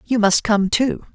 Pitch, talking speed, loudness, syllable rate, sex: 220 Hz, 210 wpm, -18 LUFS, 4.0 syllables/s, female